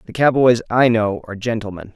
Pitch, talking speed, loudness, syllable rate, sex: 110 Hz, 185 wpm, -17 LUFS, 5.9 syllables/s, male